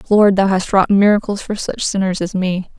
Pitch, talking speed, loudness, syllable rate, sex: 195 Hz, 215 wpm, -16 LUFS, 5.1 syllables/s, female